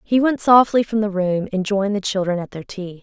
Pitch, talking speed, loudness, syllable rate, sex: 200 Hz, 260 wpm, -18 LUFS, 5.6 syllables/s, female